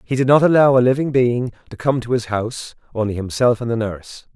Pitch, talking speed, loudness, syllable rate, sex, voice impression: 120 Hz, 235 wpm, -18 LUFS, 6.0 syllables/s, male, masculine, adult-like, tensed, powerful, slightly muffled, fluent, friendly, wild, lively, slightly intense, light